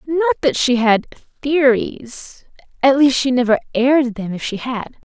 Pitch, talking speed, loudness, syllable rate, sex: 260 Hz, 150 wpm, -17 LUFS, 4.5 syllables/s, female